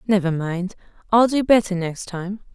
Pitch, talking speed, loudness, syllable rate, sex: 195 Hz, 165 wpm, -20 LUFS, 4.6 syllables/s, female